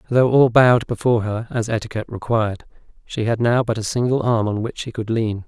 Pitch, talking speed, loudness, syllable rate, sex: 115 Hz, 220 wpm, -19 LUFS, 6.0 syllables/s, male